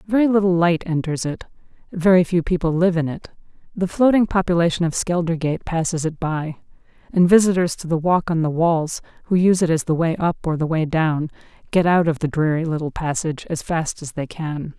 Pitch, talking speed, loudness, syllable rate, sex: 170 Hz, 205 wpm, -20 LUFS, 5.6 syllables/s, female